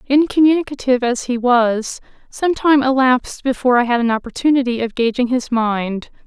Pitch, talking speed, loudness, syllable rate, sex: 250 Hz, 155 wpm, -16 LUFS, 5.4 syllables/s, female